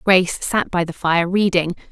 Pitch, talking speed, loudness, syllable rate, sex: 180 Hz, 190 wpm, -18 LUFS, 4.8 syllables/s, female